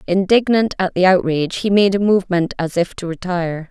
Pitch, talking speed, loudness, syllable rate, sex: 185 Hz, 195 wpm, -17 LUFS, 5.7 syllables/s, female